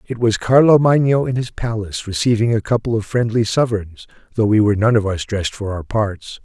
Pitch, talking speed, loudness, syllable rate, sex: 110 Hz, 215 wpm, -17 LUFS, 5.8 syllables/s, male